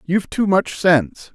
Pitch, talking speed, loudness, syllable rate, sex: 175 Hz, 180 wpm, -17 LUFS, 4.8 syllables/s, male